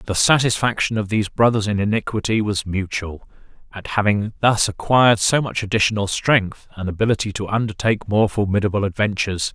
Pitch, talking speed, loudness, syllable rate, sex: 105 Hz, 150 wpm, -19 LUFS, 5.7 syllables/s, male